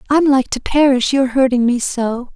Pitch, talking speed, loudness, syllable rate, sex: 260 Hz, 255 wpm, -15 LUFS, 6.1 syllables/s, female